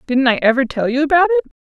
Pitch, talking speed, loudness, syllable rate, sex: 280 Hz, 255 wpm, -15 LUFS, 7.4 syllables/s, female